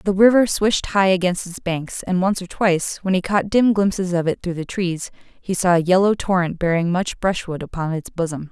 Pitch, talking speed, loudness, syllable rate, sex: 185 Hz, 225 wpm, -20 LUFS, 5.2 syllables/s, female